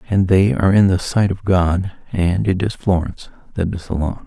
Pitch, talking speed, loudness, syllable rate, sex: 95 Hz, 210 wpm, -17 LUFS, 5.3 syllables/s, male